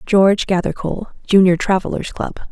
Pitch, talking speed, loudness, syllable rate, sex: 190 Hz, 120 wpm, -17 LUFS, 5.7 syllables/s, female